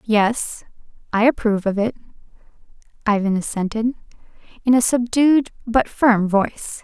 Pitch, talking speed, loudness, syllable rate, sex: 225 Hz, 115 wpm, -19 LUFS, 4.6 syllables/s, female